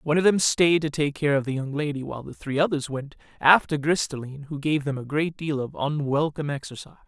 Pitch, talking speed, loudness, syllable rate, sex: 145 Hz, 245 wpm, -24 LUFS, 6.0 syllables/s, male